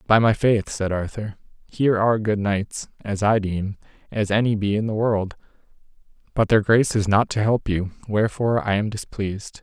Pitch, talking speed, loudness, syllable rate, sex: 105 Hz, 185 wpm, -22 LUFS, 5.4 syllables/s, male